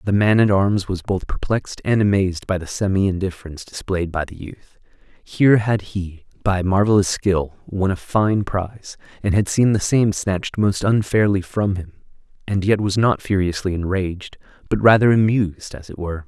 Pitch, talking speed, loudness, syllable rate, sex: 95 Hz, 180 wpm, -19 LUFS, 5.1 syllables/s, male